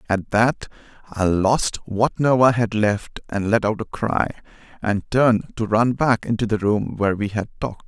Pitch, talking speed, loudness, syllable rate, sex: 110 Hz, 200 wpm, -20 LUFS, 4.8 syllables/s, male